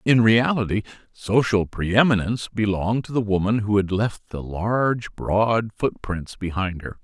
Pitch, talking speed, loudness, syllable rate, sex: 105 Hz, 145 wpm, -22 LUFS, 4.4 syllables/s, male